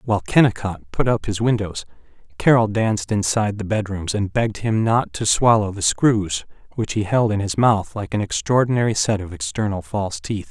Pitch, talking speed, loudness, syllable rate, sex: 105 Hz, 190 wpm, -20 LUFS, 5.4 syllables/s, male